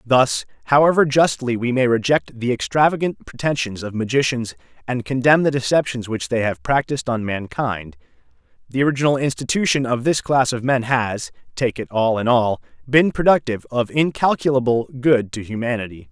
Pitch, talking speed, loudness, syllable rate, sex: 125 Hz, 155 wpm, -19 LUFS, 5.3 syllables/s, male